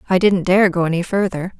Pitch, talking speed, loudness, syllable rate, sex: 185 Hz, 225 wpm, -17 LUFS, 5.8 syllables/s, female